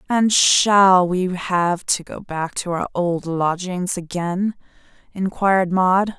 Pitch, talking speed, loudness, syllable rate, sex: 185 Hz, 135 wpm, -19 LUFS, 3.4 syllables/s, female